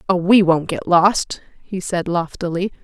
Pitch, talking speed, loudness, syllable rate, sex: 180 Hz, 170 wpm, -17 LUFS, 4.3 syllables/s, female